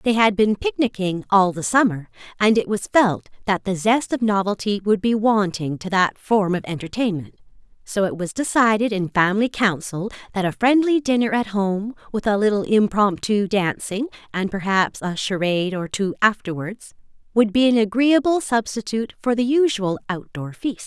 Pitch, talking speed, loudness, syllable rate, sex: 210 Hz, 170 wpm, -20 LUFS, 5.0 syllables/s, female